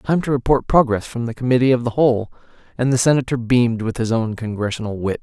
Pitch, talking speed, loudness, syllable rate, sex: 120 Hz, 220 wpm, -19 LUFS, 6.4 syllables/s, male